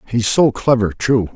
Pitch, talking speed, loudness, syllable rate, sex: 115 Hz, 175 wpm, -16 LUFS, 4.5 syllables/s, male